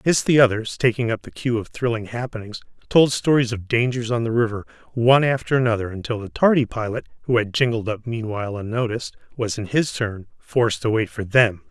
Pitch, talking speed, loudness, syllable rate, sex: 115 Hz, 205 wpm, -21 LUFS, 5.9 syllables/s, male